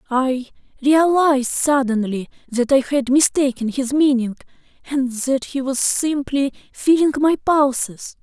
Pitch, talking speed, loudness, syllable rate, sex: 270 Hz, 125 wpm, -18 LUFS, 4.1 syllables/s, female